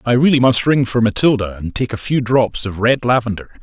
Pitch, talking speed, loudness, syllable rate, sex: 120 Hz, 230 wpm, -16 LUFS, 5.5 syllables/s, male